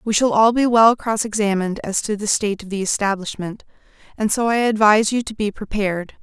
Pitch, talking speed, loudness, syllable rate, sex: 210 Hz, 210 wpm, -19 LUFS, 6.0 syllables/s, female